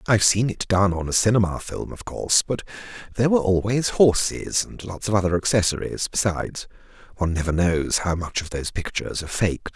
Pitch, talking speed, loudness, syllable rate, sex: 95 Hz, 190 wpm, -22 LUFS, 6.2 syllables/s, male